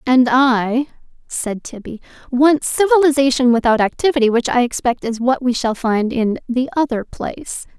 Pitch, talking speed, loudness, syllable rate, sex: 250 Hz, 155 wpm, -17 LUFS, 4.8 syllables/s, female